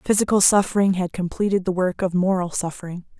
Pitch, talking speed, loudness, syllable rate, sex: 185 Hz, 170 wpm, -20 LUFS, 6.0 syllables/s, female